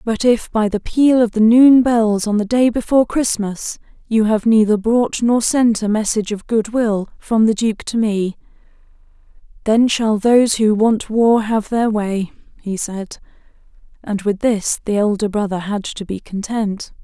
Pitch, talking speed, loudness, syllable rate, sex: 220 Hz, 180 wpm, -16 LUFS, 4.3 syllables/s, female